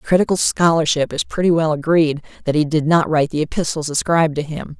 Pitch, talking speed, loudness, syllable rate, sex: 155 Hz, 200 wpm, -18 LUFS, 6.1 syllables/s, female